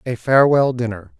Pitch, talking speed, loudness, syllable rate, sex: 125 Hz, 150 wpm, -16 LUFS, 5.7 syllables/s, male